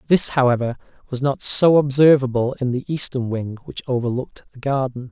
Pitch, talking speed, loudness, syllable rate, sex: 130 Hz, 165 wpm, -19 LUFS, 5.6 syllables/s, male